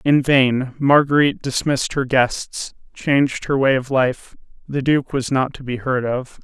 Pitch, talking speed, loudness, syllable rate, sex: 135 Hz, 175 wpm, -19 LUFS, 4.3 syllables/s, male